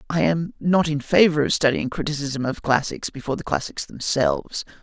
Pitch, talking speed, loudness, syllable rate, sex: 145 Hz, 175 wpm, -22 LUFS, 5.4 syllables/s, male